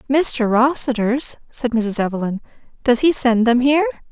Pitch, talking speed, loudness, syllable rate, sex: 240 Hz, 130 wpm, -17 LUFS, 4.8 syllables/s, female